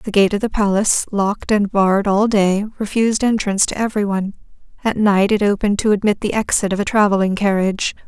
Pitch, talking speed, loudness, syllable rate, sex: 205 Hz, 200 wpm, -17 LUFS, 6.3 syllables/s, female